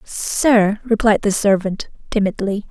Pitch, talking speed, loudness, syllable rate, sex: 205 Hz, 110 wpm, -17 LUFS, 3.8 syllables/s, female